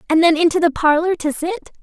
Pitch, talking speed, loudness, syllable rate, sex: 330 Hz, 230 wpm, -17 LUFS, 6.6 syllables/s, female